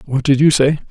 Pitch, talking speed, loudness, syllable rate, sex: 140 Hz, 265 wpm, -14 LUFS, 6.0 syllables/s, male